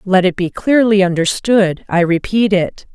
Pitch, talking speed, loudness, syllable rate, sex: 195 Hz, 165 wpm, -14 LUFS, 4.3 syllables/s, female